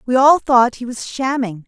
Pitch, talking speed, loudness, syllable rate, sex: 250 Hz, 215 wpm, -16 LUFS, 4.6 syllables/s, female